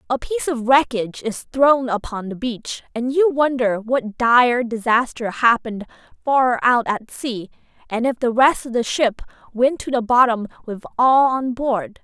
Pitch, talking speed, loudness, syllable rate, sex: 245 Hz, 175 wpm, -19 LUFS, 4.4 syllables/s, female